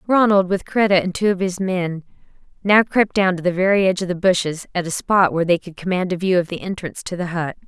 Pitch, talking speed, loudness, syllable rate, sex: 185 Hz, 260 wpm, -19 LUFS, 6.2 syllables/s, female